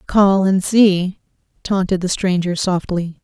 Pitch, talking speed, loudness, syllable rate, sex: 185 Hz, 130 wpm, -17 LUFS, 3.7 syllables/s, female